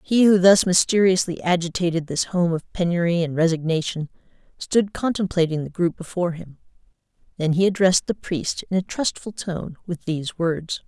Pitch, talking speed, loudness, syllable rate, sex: 175 Hz, 160 wpm, -21 LUFS, 5.3 syllables/s, female